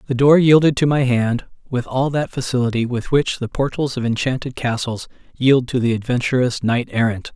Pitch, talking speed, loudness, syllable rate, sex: 125 Hz, 190 wpm, -18 LUFS, 5.3 syllables/s, male